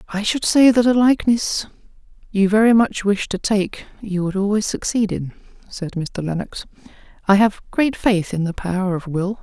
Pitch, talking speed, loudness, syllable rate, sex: 205 Hz, 185 wpm, -19 LUFS, 4.9 syllables/s, female